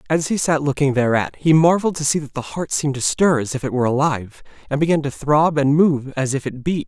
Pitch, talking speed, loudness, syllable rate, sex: 145 Hz, 260 wpm, -19 LUFS, 6.1 syllables/s, male